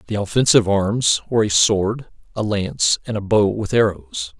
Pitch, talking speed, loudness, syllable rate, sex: 105 Hz, 175 wpm, -18 LUFS, 5.1 syllables/s, male